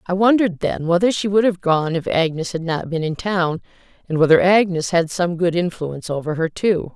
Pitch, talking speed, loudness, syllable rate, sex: 175 Hz, 215 wpm, -19 LUFS, 5.3 syllables/s, female